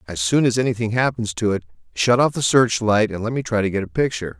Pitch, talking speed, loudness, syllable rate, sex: 115 Hz, 275 wpm, -20 LUFS, 6.4 syllables/s, male